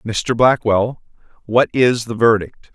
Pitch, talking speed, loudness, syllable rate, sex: 115 Hz, 130 wpm, -16 LUFS, 3.6 syllables/s, male